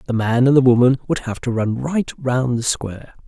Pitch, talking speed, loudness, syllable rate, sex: 125 Hz, 240 wpm, -18 LUFS, 5.1 syllables/s, male